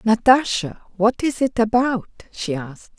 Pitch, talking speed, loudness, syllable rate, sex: 220 Hz, 140 wpm, -20 LUFS, 4.5 syllables/s, female